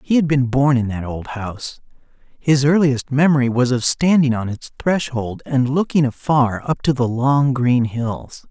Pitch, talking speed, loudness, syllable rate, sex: 130 Hz, 185 wpm, -18 LUFS, 4.4 syllables/s, male